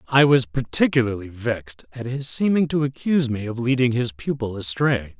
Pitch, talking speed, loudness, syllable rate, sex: 125 Hz, 175 wpm, -21 LUFS, 5.3 syllables/s, male